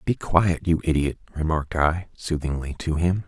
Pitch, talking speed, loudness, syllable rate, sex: 80 Hz, 165 wpm, -24 LUFS, 5.0 syllables/s, male